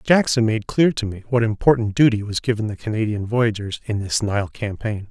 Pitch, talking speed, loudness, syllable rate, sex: 110 Hz, 200 wpm, -20 LUFS, 5.3 syllables/s, male